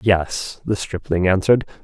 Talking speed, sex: 130 wpm, male